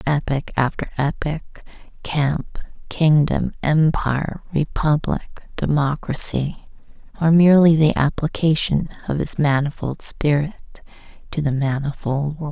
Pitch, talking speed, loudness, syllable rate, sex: 150 Hz, 95 wpm, -20 LUFS, 4.1 syllables/s, female